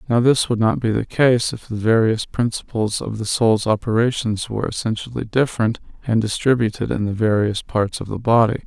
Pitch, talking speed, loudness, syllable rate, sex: 115 Hz, 185 wpm, -19 LUFS, 5.4 syllables/s, male